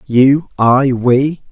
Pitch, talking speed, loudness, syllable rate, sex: 130 Hz, 120 wpm, -12 LUFS, 2.4 syllables/s, male